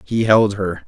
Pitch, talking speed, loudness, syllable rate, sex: 100 Hz, 205 wpm, -16 LUFS, 4.1 syllables/s, male